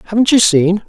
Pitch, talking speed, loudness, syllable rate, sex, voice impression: 200 Hz, 205 wpm, -11 LUFS, 5.6 syllables/s, male, very masculine, very adult-like, very middle-aged, very thick, slightly relaxed, slightly weak, slightly dark, slightly soft, slightly muffled, fluent, cool, very intellectual, slightly refreshing, sincere, calm, mature, friendly, very reassuring, unique, elegant, slightly wild, sweet, slightly lively, kind, slightly modest